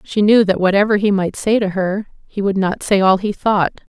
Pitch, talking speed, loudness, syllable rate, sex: 200 Hz, 245 wpm, -16 LUFS, 5.1 syllables/s, female